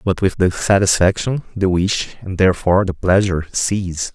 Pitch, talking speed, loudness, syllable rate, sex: 95 Hz, 160 wpm, -17 LUFS, 5.3 syllables/s, male